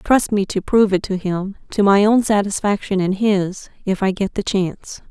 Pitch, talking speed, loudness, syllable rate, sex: 200 Hz, 190 wpm, -18 LUFS, 5.0 syllables/s, female